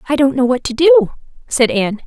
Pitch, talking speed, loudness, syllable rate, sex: 265 Hz, 230 wpm, -14 LUFS, 5.9 syllables/s, female